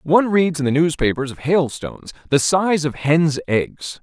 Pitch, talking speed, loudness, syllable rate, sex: 150 Hz, 180 wpm, -18 LUFS, 4.5 syllables/s, male